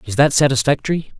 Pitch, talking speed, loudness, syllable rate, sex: 135 Hz, 150 wpm, -16 LUFS, 6.6 syllables/s, male